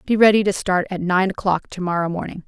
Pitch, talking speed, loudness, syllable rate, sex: 185 Hz, 240 wpm, -19 LUFS, 6.3 syllables/s, female